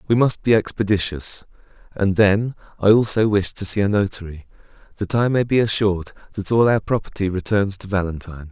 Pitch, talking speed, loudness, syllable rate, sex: 100 Hz, 175 wpm, -19 LUFS, 5.7 syllables/s, male